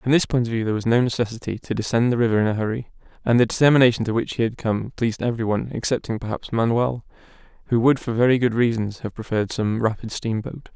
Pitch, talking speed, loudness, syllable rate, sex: 115 Hz, 230 wpm, -22 LUFS, 6.8 syllables/s, male